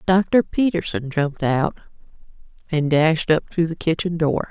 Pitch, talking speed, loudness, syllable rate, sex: 165 Hz, 145 wpm, -20 LUFS, 4.3 syllables/s, female